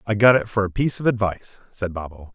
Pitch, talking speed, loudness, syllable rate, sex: 105 Hz, 255 wpm, -21 LUFS, 6.5 syllables/s, male